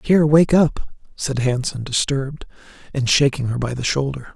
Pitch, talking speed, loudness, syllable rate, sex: 135 Hz, 165 wpm, -19 LUFS, 5.2 syllables/s, male